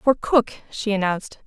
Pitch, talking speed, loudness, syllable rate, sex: 215 Hz, 165 wpm, -22 LUFS, 5.3 syllables/s, female